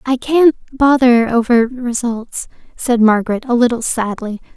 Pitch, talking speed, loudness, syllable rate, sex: 240 Hz, 130 wpm, -14 LUFS, 4.4 syllables/s, female